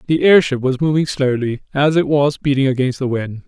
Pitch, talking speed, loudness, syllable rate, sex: 135 Hz, 205 wpm, -16 LUFS, 5.4 syllables/s, male